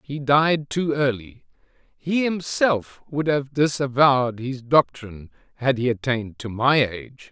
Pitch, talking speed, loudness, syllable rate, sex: 135 Hz, 140 wpm, -21 LUFS, 4.3 syllables/s, male